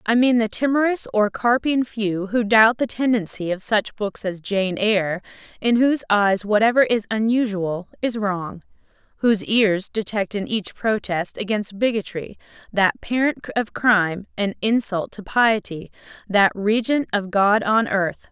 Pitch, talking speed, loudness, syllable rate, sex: 210 Hz, 145 wpm, -20 LUFS, 4.3 syllables/s, female